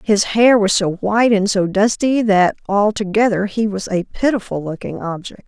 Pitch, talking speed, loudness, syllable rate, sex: 205 Hz, 175 wpm, -16 LUFS, 4.8 syllables/s, female